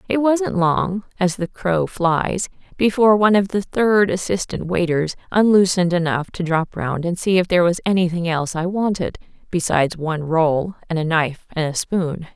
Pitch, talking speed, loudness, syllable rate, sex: 180 Hz, 175 wpm, -19 LUFS, 5.0 syllables/s, female